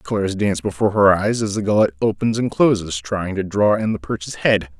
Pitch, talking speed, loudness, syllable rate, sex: 100 Hz, 225 wpm, -19 LUFS, 5.4 syllables/s, male